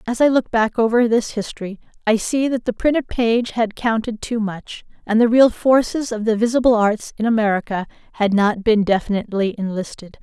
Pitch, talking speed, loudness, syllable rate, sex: 225 Hz, 190 wpm, -18 LUFS, 5.3 syllables/s, female